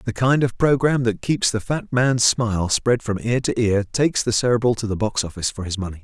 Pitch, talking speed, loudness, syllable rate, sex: 115 Hz, 250 wpm, -20 LUFS, 5.6 syllables/s, male